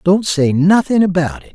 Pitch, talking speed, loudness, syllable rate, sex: 175 Hz, 195 wpm, -14 LUFS, 4.9 syllables/s, male